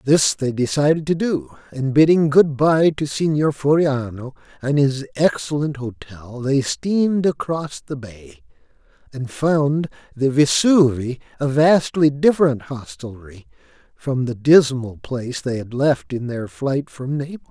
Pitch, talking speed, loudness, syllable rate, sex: 140 Hz, 140 wpm, -19 LUFS, 4.2 syllables/s, male